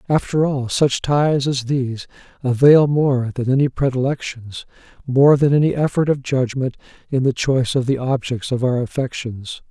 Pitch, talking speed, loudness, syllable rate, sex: 130 Hz, 160 wpm, -18 LUFS, 4.9 syllables/s, male